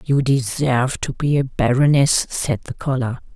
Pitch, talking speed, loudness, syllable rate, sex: 130 Hz, 160 wpm, -19 LUFS, 4.4 syllables/s, female